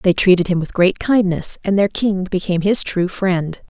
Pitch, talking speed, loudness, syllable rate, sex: 185 Hz, 205 wpm, -17 LUFS, 4.8 syllables/s, female